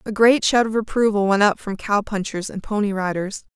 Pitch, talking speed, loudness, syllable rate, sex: 205 Hz, 205 wpm, -20 LUFS, 5.3 syllables/s, female